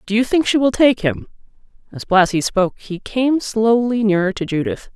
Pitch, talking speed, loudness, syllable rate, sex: 210 Hz, 195 wpm, -17 LUFS, 5.1 syllables/s, female